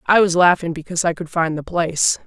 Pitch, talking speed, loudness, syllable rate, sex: 170 Hz, 240 wpm, -18 LUFS, 6.2 syllables/s, female